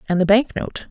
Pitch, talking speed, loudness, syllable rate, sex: 205 Hz, 265 wpm, -18 LUFS, 5.7 syllables/s, female